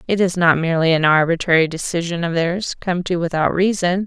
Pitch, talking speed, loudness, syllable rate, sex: 170 Hz, 190 wpm, -18 LUFS, 5.7 syllables/s, female